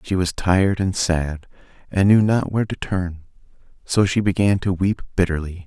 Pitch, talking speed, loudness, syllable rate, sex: 90 Hz, 180 wpm, -20 LUFS, 5.0 syllables/s, male